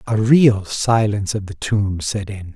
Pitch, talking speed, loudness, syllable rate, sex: 105 Hz, 190 wpm, -18 LUFS, 4.2 syllables/s, male